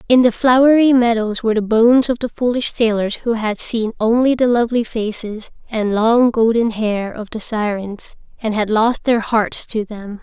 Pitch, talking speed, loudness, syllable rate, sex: 225 Hz, 190 wpm, -16 LUFS, 4.7 syllables/s, female